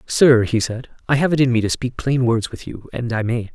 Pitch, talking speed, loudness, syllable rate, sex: 120 Hz, 290 wpm, -19 LUFS, 5.4 syllables/s, male